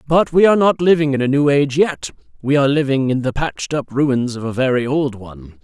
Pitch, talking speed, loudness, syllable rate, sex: 135 Hz, 245 wpm, -16 LUFS, 6.0 syllables/s, male